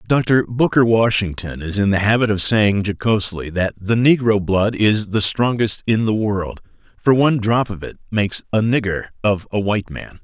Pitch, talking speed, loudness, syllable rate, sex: 105 Hz, 190 wpm, -18 LUFS, 4.9 syllables/s, male